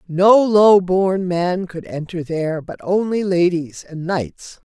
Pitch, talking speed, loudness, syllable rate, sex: 180 Hz, 155 wpm, -17 LUFS, 3.6 syllables/s, female